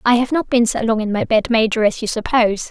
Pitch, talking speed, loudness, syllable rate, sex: 225 Hz, 290 wpm, -17 LUFS, 6.1 syllables/s, female